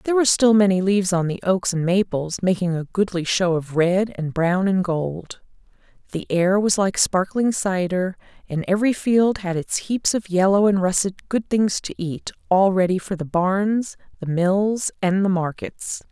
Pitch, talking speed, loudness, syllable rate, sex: 190 Hz, 185 wpm, -20 LUFS, 4.5 syllables/s, female